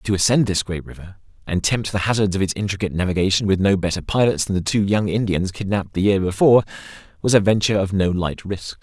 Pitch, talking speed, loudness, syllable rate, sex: 100 Hz, 225 wpm, -20 LUFS, 6.4 syllables/s, male